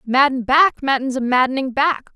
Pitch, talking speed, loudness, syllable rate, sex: 265 Hz, 165 wpm, -17 LUFS, 5.0 syllables/s, female